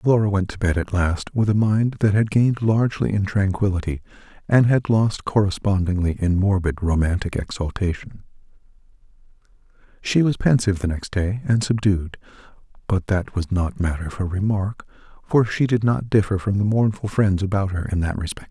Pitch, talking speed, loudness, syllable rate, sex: 100 Hz, 170 wpm, -21 LUFS, 5.2 syllables/s, male